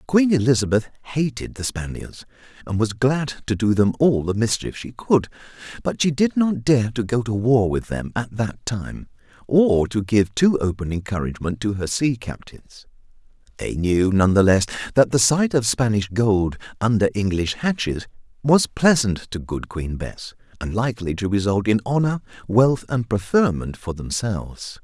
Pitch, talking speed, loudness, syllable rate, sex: 115 Hz, 170 wpm, -21 LUFS, 4.6 syllables/s, male